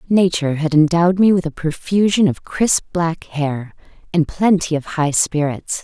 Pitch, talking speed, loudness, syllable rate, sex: 165 Hz, 165 wpm, -17 LUFS, 4.6 syllables/s, female